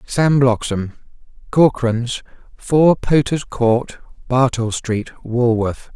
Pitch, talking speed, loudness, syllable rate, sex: 125 Hz, 90 wpm, -17 LUFS, 3.1 syllables/s, male